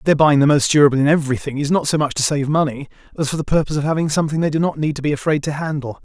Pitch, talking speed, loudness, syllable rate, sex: 150 Hz, 300 wpm, -18 LUFS, 7.7 syllables/s, male